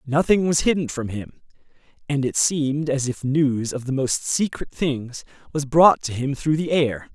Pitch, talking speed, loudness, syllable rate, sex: 140 Hz, 195 wpm, -21 LUFS, 4.4 syllables/s, male